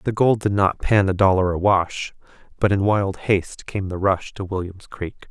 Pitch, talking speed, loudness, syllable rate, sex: 95 Hz, 215 wpm, -21 LUFS, 4.6 syllables/s, male